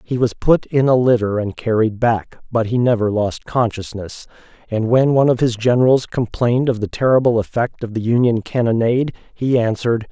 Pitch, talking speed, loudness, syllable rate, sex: 115 Hz, 185 wpm, -17 LUFS, 5.3 syllables/s, male